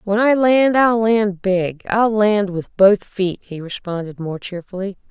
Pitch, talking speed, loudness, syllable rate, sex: 200 Hz, 165 wpm, -17 LUFS, 3.9 syllables/s, female